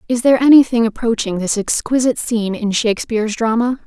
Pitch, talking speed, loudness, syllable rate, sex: 230 Hz, 155 wpm, -16 LUFS, 6.4 syllables/s, female